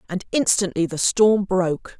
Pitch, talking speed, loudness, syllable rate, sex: 190 Hz, 150 wpm, -20 LUFS, 4.6 syllables/s, female